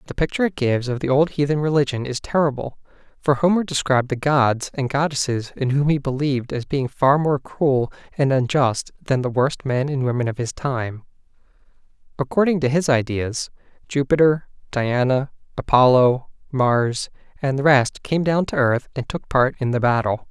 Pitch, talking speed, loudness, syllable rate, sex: 135 Hz, 175 wpm, -20 LUFS, 5.1 syllables/s, male